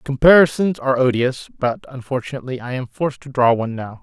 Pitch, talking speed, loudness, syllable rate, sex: 130 Hz, 180 wpm, -18 LUFS, 6.4 syllables/s, male